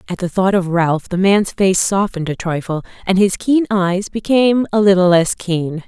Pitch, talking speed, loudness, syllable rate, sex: 190 Hz, 205 wpm, -16 LUFS, 4.9 syllables/s, female